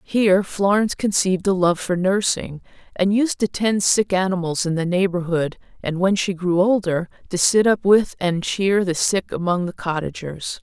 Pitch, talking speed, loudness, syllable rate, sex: 185 Hz, 180 wpm, -20 LUFS, 4.7 syllables/s, female